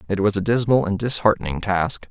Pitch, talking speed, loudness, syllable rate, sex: 100 Hz, 200 wpm, -20 LUFS, 5.7 syllables/s, male